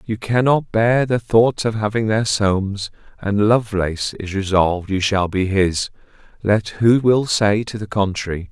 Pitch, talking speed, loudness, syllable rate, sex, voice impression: 105 Hz, 170 wpm, -18 LUFS, 4.5 syllables/s, male, masculine, adult-like, slightly halting, cool, intellectual, slightly mature, slightly sweet